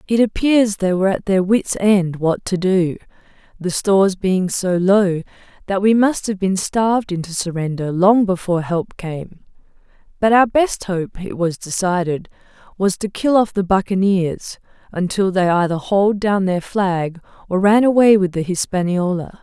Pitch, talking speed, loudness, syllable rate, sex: 190 Hz, 165 wpm, -17 LUFS, 4.5 syllables/s, female